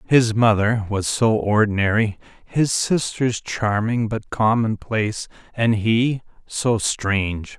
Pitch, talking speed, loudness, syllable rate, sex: 110 Hz, 110 wpm, -20 LUFS, 3.6 syllables/s, male